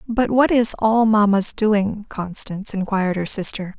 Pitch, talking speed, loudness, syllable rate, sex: 210 Hz, 160 wpm, -18 LUFS, 4.5 syllables/s, female